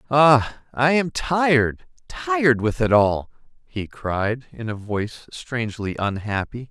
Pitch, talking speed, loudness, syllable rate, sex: 120 Hz, 125 wpm, -21 LUFS, 3.9 syllables/s, male